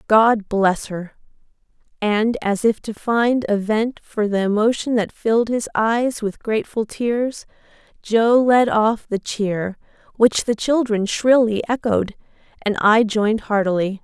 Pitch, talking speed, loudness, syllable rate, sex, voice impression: 220 Hz, 145 wpm, -19 LUFS, 4.0 syllables/s, female, feminine, adult-like, tensed, powerful, clear, fluent, intellectual, elegant, lively, intense, sharp